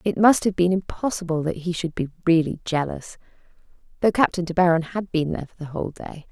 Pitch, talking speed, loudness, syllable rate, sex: 175 Hz, 200 wpm, -23 LUFS, 6.0 syllables/s, female